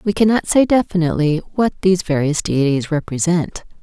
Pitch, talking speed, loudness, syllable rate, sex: 175 Hz, 140 wpm, -17 LUFS, 5.7 syllables/s, female